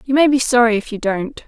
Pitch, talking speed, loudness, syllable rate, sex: 235 Hz, 285 wpm, -16 LUFS, 5.8 syllables/s, female